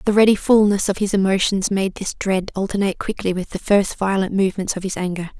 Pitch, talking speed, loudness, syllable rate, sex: 195 Hz, 210 wpm, -19 LUFS, 6.0 syllables/s, female